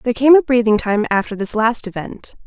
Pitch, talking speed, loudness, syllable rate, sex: 230 Hz, 220 wpm, -15 LUFS, 5.5 syllables/s, female